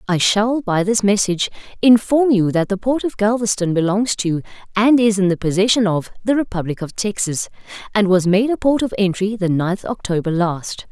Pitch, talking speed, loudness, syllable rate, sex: 205 Hz, 200 wpm, -18 LUFS, 5.3 syllables/s, female